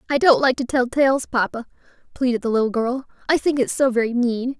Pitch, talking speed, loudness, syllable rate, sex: 250 Hz, 220 wpm, -20 LUFS, 5.7 syllables/s, female